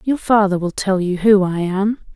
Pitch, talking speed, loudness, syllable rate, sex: 200 Hz, 225 wpm, -17 LUFS, 4.7 syllables/s, female